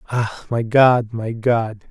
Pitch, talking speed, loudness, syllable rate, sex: 115 Hz, 155 wpm, -18 LUFS, 3.1 syllables/s, male